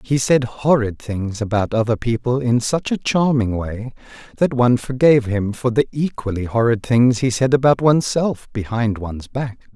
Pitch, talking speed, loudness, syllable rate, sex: 120 Hz, 170 wpm, -18 LUFS, 4.9 syllables/s, male